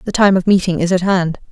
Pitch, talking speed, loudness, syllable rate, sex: 185 Hz, 275 wpm, -14 LUFS, 6.2 syllables/s, female